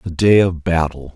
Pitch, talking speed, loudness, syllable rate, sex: 85 Hz, 210 wpm, -16 LUFS, 4.8 syllables/s, male